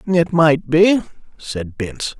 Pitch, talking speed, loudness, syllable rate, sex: 160 Hz, 135 wpm, -17 LUFS, 3.6 syllables/s, male